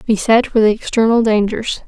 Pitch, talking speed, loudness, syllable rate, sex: 220 Hz, 130 wpm, -14 LUFS, 4.8 syllables/s, female